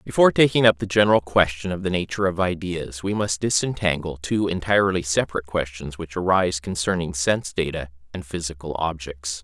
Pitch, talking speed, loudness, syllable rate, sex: 90 Hz, 165 wpm, -22 LUFS, 5.9 syllables/s, male